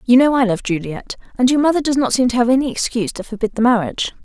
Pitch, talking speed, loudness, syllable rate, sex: 240 Hz, 270 wpm, -17 LUFS, 7.0 syllables/s, female